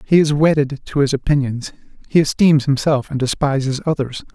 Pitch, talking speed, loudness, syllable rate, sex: 140 Hz, 165 wpm, -17 LUFS, 5.3 syllables/s, male